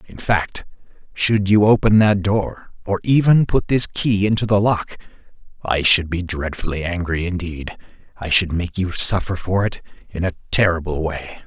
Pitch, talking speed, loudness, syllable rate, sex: 95 Hz, 165 wpm, -18 LUFS, 4.6 syllables/s, male